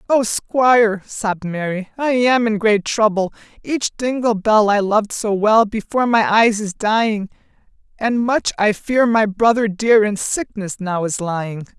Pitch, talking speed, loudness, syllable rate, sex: 215 Hz, 170 wpm, -17 LUFS, 4.3 syllables/s, female